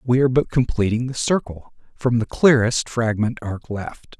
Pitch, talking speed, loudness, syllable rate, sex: 120 Hz, 170 wpm, -20 LUFS, 4.6 syllables/s, male